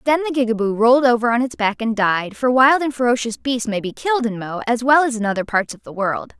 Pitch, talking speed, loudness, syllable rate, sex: 235 Hz, 270 wpm, -18 LUFS, 6.1 syllables/s, female